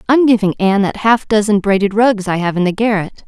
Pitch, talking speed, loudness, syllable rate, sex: 205 Hz, 240 wpm, -14 LUFS, 5.9 syllables/s, female